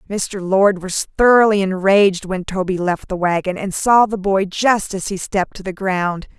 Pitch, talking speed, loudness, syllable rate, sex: 190 Hz, 195 wpm, -17 LUFS, 4.7 syllables/s, female